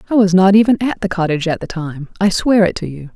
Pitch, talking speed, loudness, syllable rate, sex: 190 Hz, 285 wpm, -15 LUFS, 6.4 syllables/s, female